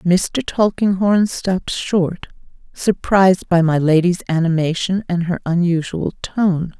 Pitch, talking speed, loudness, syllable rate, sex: 180 Hz, 115 wpm, -17 LUFS, 3.7 syllables/s, female